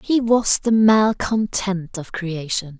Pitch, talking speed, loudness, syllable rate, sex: 200 Hz, 130 wpm, -19 LUFS, 3.4 syllables/s, female